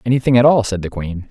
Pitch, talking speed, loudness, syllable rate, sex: 110 Hz, 275 wpm, -15 LUFS, 6.6 syllables/s, male